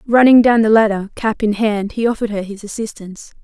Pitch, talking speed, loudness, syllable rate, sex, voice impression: 215 Hz, 210 wpm, -15 LUFS, 6.0 syllables/s, female, feminine, slightly adult-like, slightly fluent, intellectual, slightly calm